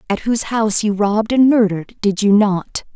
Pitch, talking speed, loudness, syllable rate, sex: 210 Hz, 205 wpm, -16 LUFS, 5.7 syllables/s, female